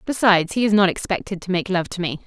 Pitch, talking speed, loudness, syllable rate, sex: 190 Hz, 265 wpm, -20 LUFS, 6.7 syllables/s, female